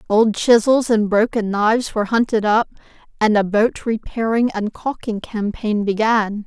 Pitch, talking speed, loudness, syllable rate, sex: 220 Hz, 150 wpm, -18 LUFS, 4.5 syllables/s, female